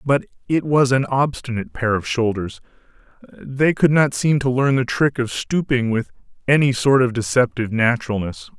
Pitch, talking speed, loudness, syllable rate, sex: 125 Hz, 170 wpm, -19 LUFS, 5.0 syllables/s, male